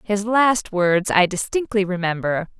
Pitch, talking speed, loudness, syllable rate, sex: 200 Hz, 140 wpm, -19 LUFS, 4.1 syllables/s, female